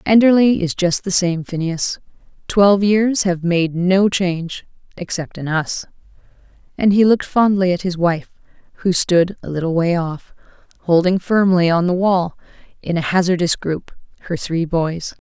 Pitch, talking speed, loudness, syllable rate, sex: 180 Hz, 155 wpm, -17 LUFS, 4.6 syllables/s, female